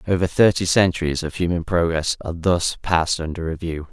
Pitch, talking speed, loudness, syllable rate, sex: 85 Hz, 170 wpm, -20 LUFS, 5.7 syllables/s, male